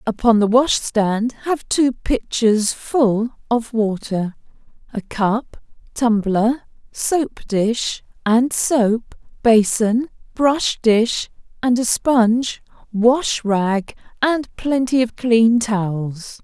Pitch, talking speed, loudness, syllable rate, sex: 230 Hz, 105 wpm, -18 LUFS, 2.8 syllables/s, female